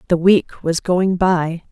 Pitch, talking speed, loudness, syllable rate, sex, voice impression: 175 Hz, 175 wpm, -17 LUFS, 3.8 syllables/s, female, very feminine, slightly young, slightly adult-like, thin, slightly tensed, slightly powerful, slightly bright, hard, clear, fluent, slightly cute, slightly cool, intellectual, slightly refreshing, sincere, slightly calm, slightly friendly, slightly reassuring, slightly elegant, slightly sweet, slightly lively, slightly strict